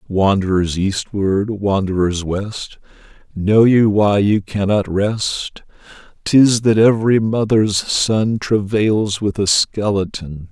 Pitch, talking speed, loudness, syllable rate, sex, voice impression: 100 Hz, 110 wpm, -16 LUFS, 3.3 syllables/s, male, masculine, middle-aged, thick, tensed, powerful, dark, clear, slightly raspy, intellectual, calm, mature, wild, lively, slightly kind